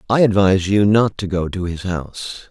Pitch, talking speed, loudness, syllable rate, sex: 95 Hz, 215 wpm, -17 LUFS, 5.4 syllables/s, male